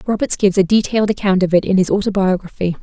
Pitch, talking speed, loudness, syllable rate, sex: 195 Hz, 210 wpm, -16 LUFS, 7.2 syllables/s, female